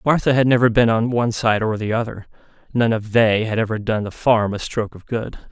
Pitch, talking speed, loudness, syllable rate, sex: 115 Hz, 240 wpm, -19 LUFS, 5.8 syllables/s, male